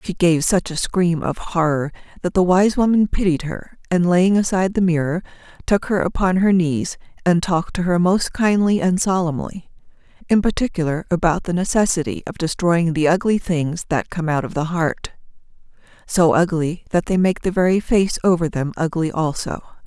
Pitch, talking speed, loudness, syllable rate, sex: 175 Hz, 175 wpm, -19 LUFS, 5.0 syllables/s, female